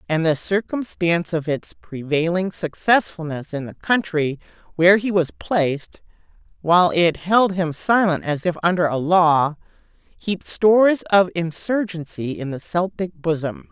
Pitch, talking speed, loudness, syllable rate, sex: 175 Hz, 140 wpm, -20 LUFS, 4.4 syllables/s, female